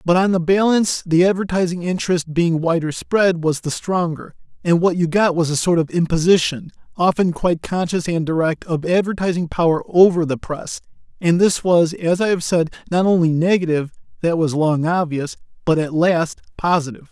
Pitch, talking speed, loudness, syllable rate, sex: 170 Hz, 180 wpm, -18 LUFS, 5.2 syllables/s, male